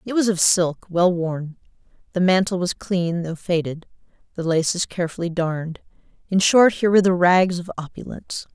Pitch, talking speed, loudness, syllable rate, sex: 180 Hz, 170 wpm, -20 LUFS, 5.3 syllables/s, female